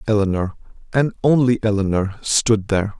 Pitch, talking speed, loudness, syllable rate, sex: 110 Hz, 120 wpm, -19 LUFS, 5.2 syllables/s, male